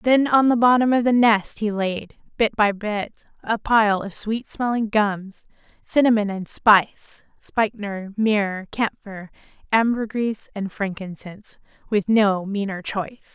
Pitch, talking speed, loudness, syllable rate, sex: 210 Hz, 140 wpm, -21 LUFS, 4.1 syllables/s, female